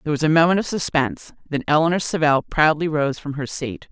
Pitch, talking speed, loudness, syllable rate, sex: 150 Hz, 215 wpm, -20 LUFS, 6.1 syllables/s, female